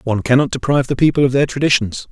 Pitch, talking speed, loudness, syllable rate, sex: 130 Hz, 225 wpm, -15 LUFS, 7.5 syllables/s, male